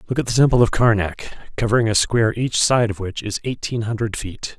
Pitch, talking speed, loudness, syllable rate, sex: 110 Hz, 225 wpm, -19 LUFS, 6.1 syllables/s, male